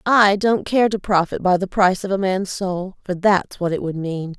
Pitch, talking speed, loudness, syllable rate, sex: 190 Hz, 230 wpm, -19 LUFS, 4.8 syllables/s, female